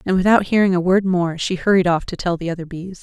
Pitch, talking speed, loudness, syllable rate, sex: 180 Hz, 275 wpm, -18 LUFS, 6.2 syllables/s, female